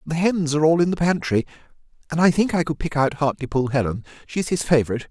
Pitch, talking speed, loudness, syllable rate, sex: 150 Hz, 225 wpm, -21 LUFS, 6.6 syllables/s, male